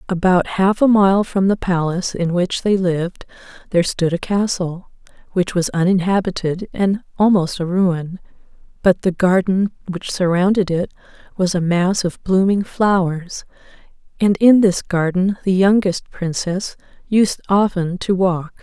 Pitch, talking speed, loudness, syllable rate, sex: 185 Hz, 145 wpm, -17 LUFS, 4.4 syllables/s, female